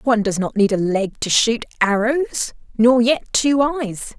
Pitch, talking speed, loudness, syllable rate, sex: 230 Hz, 185 wpm, -18 LUFS, 4.3 syllables/s, female